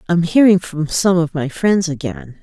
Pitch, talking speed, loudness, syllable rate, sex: 165 Hz, 200 wpm, -16 LUFS, 4.5 syllables/s, female